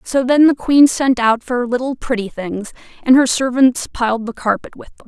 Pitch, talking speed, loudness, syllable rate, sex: 250 Hz, 215 wpm, -15 LUFS, 4.9 syllables/s, female